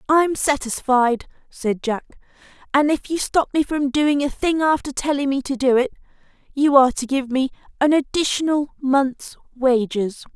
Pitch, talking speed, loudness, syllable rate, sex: 275 Hz, 160 wpm, -20 LUFS, 4.7 syllables/s, female